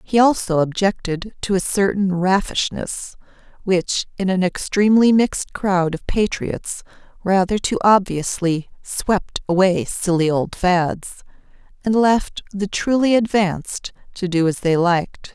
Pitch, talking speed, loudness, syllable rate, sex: 190 Hz, 130 wpm, -19 LUFS, 4.1 syllables/s, female